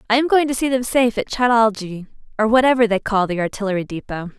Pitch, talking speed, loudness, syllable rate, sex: 225 Hz, 220 wpm, -18 LUFS, 6.5 syllables/s, female